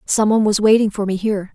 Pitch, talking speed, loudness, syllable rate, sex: 205 Hz, 270 wpm, -16 LUFS, 6.9 syllables/s, female